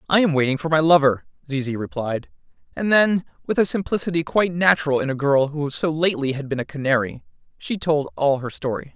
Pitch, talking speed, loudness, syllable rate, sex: 150 Hz, 200 wpm, -21 LUFS, 5.9 syllables/s, male